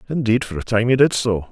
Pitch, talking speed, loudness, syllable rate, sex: 115 Hz, 280 wpm, -18 LUFS, 6.1 syllables/s, male